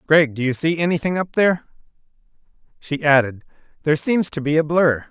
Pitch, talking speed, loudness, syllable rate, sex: 155 Hz, 175 wpm, -19 LUFS, 5.9 syllables/s, male